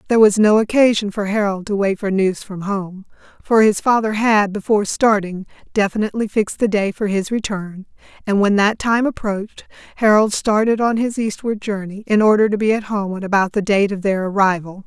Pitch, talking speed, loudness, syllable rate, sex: 205 Hz, 195 wpm, -17 LUFS, 5.4 syllables/s, female